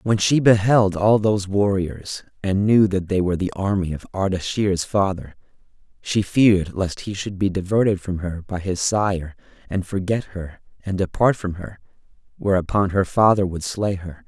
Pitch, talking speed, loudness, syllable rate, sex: 95 Hz, 170 wpm, -21 LUFS, 4.7 syllables/s, male